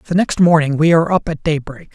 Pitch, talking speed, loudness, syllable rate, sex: 160 Hz, 245 wpm, -15 LUFS, 6.4 syllables/s, male